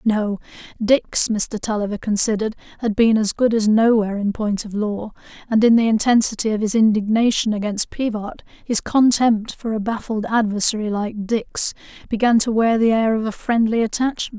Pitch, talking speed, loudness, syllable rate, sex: 220 Hz, 170 wpm, -19 LUFS, 5.1 syllables/s, female